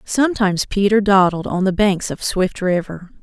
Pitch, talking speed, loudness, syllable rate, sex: 195 Hz, 165 wpm, -17 LUFS, 5.0 syllables/s, female